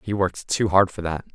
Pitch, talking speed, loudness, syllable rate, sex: 95 Hz, 265 wpm, -22 LUFS, 6.0 syllables/s, male